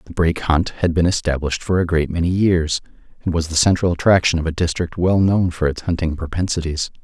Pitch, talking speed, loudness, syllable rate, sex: 85 Hz, 215 wpm, -19 LUFS, 6.0 syllables/s, male